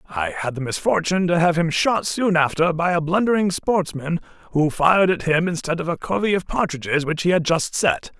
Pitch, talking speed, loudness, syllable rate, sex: 165 Hz, 210 wpm, -20 LUFS, 5.5 syllables/s, male